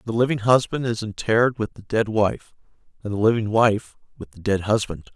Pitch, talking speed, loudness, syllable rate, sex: 110 Hz, 200 wpm, -22 LUFS, 5.4 syllables/s, male